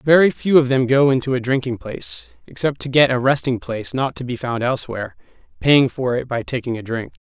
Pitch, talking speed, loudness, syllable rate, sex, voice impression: 130 Hz, 225 wpm, -19 LUFS, 5.8 syllables/s, male, very masculine, slightly young, slightly thick, tensed, slightly powerful, very bright, hard, very clear, very fluent, cool, intellectual, very refreshing, very sincere, calm, slightly mature, friendly, reassuring, slightly unique, slightly elegant, wild, slightly sweet, lively, kind, slightly intense, slightly light